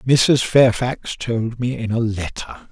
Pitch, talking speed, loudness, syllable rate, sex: 120 Hz, 155 wpm, -19 LUFS, 3.4 syllables/s, male